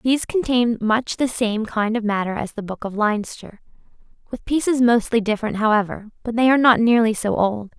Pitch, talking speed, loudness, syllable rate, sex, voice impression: 225 Hz, 175 wpm, -20 LUFS, 5.4 syllables/s, female, feminine, slightly young, tensed, powerful, bright, soft, clear, slightly intellectual, friendly, elegant, lively, kind